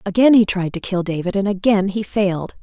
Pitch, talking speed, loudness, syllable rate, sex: 195 Hz, 230 wpm, -18 LUFS, 5.7 syllables/s, female